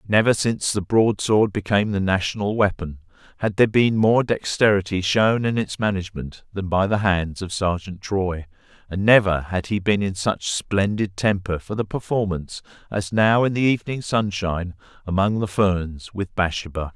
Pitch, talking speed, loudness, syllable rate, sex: 100 Hz, 165 wpm, -21 LUFS, 5.0 syllables/s, male